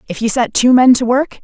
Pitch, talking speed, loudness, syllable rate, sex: 245 Hz, 295 wpm, -12 LUFS, 5.6 syllables/s, female